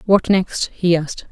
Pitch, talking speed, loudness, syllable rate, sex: 180 Hz, 185 wpm, -18 LUFS, 4.5 syllables/s, female